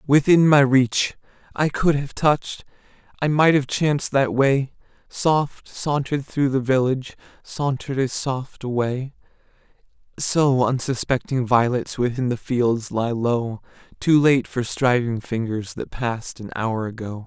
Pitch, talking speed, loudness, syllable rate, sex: 130 Hz, 140 wpm, -21 LUFS, 4.2 syllables/s, male